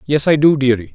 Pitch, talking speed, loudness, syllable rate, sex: 140 Hz, 255 wpm, -14 LUFS, 6.2 syllables/s, male